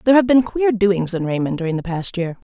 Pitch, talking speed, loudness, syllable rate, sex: 200 Hz, 265 wpm, -18 LUFS, 6.1 syllables/s, female